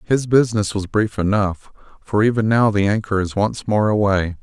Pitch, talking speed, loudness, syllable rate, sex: 105 Hz, 190 wpm, -18 LUFS, 5.0 syllables/s, male